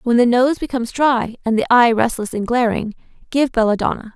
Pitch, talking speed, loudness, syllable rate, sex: 240 Hz, 190 wpm, -17 LUFS, 5.7 syllables/s, female